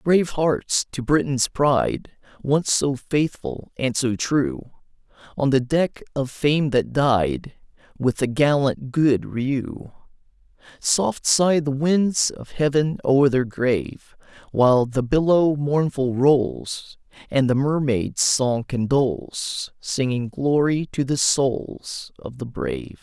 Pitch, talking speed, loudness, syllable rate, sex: 140 Hz, 130 wpm, -21 LUFS, 3.4 syllables/s, male